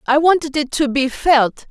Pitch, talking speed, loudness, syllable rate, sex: 285 Hz, 210 wpm, -16 LUFS, 4.5 syllables/s, female